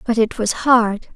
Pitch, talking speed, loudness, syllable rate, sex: 225 Hz, 210 wpm, -17 LUFS, 4.3 syllables/s, female